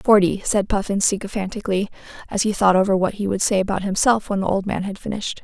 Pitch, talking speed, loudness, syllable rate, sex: 200 Hz, 220 wpm, -20 LUFS, 6.6 syllables/s, female